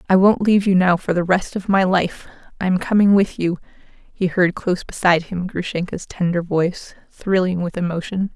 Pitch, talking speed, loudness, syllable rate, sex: 185 Hz, 185 wpm, -19 LUFS, 5.2 syllables/s, female